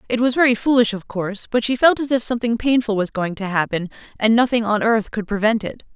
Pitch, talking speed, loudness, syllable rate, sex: 225 Hz, 240 wpm, -19 LUFS, 6.1 syllables/s, female